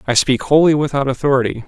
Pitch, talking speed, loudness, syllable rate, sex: 135 Hz, 180 wpm, -15 LUFS, 6.6 syllables/s, male